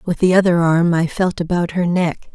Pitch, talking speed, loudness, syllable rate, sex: 175 Hz, 230 wpm, -17 LUFS, 4.8 syllables/s, female